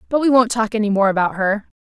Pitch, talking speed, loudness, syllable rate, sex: 220 Hz, 265 wpm, -17 LUFS, 6.6 syllables/s, female